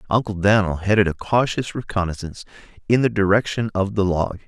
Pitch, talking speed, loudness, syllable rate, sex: 100 Hz, 160 wpm, -20 LUFS, 5.6 syllables/s, male